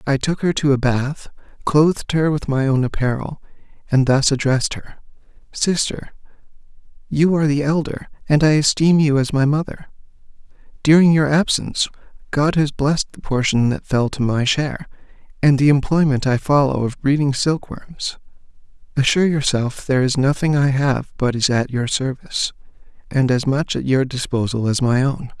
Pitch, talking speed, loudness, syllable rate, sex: 140 Hz, 170 wpm, -18 LUFS, 5.1 syllables/s, male